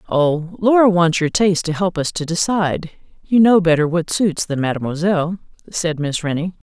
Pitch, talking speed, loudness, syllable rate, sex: 170 Hz, 180 wpm, -17 LUFS, 5.2 syllables/s, female